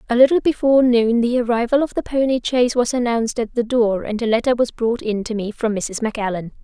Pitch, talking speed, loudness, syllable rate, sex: 235 Hz, 235 wpm, -18 LUFS, 6.0 syllables/s, female